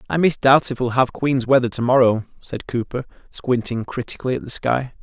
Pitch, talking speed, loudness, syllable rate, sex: 125 Hz, 180 wpm, -20 LUFS, 5.5 syllables/s, male